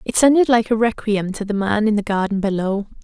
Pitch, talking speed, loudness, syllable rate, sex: 210 Hz, 235 wpm, -18 LUFS, 5.8 syllables/s, female